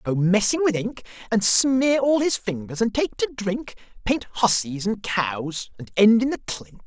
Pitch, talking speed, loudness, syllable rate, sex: 220 Hz, 190 wpm, -22 LUFS, 4.3 syllables/s, male